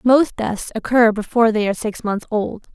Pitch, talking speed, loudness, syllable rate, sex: 220 Hz, 195 wpm, -19 LUFS, 5.2 syllables/s, female